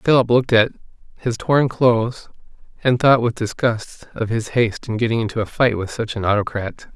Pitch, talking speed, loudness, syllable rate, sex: 115 Hz, 190 wpm, -19 LUFS, 5.3 syllables/s, male